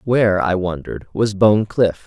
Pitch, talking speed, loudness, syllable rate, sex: 100 Hz, 175 wpm, -18 LUFS, 4.8 syllables/s, male